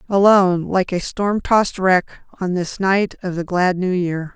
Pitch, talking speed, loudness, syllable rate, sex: 185 Hz, 195 wpm, -18 LUFS, 4.5 syllables/s, female